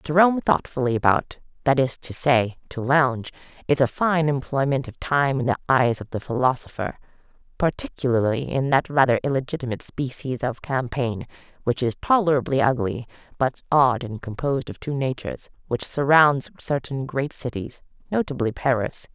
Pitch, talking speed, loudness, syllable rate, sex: 135 Hz, 150 wpm, -23 LUFS, 5.1 syllables/s, female